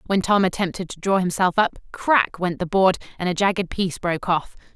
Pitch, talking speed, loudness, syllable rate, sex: 185 Hz, 215 wpm, -21 LUFS, 5.7 syllables/s, female